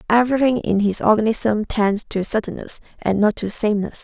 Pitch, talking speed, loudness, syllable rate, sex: 215 Hz, 165 wpm, -19 LUFS, 5.6 syllables/s, female